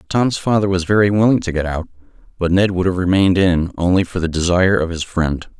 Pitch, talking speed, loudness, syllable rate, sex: 90 Hz, 225 wpm, -17 LUFS, 6.1 syllables/s, male